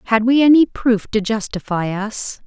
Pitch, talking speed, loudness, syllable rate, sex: 225 Hz, 170 wpm, -17 LUFS, 4.6 syllables/s, female